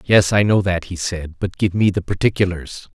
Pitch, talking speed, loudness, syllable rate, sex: 95 Hz, 225 wpm, -19 LUFS, 5.0 syllables/s, male